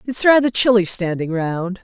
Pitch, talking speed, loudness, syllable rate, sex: 205 Hz, 165 wpm, -17 LUFS, 4.7 syllables/s, female